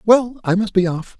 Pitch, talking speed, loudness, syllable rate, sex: 210 Hz, 250 wpm, -18 LUFS, 4.8 syllables/s, male